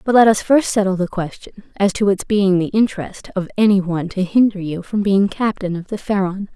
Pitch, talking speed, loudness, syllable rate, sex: 195 Hz, 230 wpm, -18 LUFS, 5.5 syllables/s, female